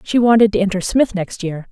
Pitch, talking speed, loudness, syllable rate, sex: 200 Hz, 245 wpm, -16 LUFS, 5.6 syllables/s, female